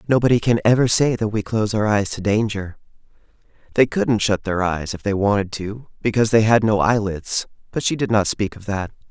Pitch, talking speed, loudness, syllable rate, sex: 110 Hz, 210 wpm, -20 LUFS, 5.5 syllables/s, male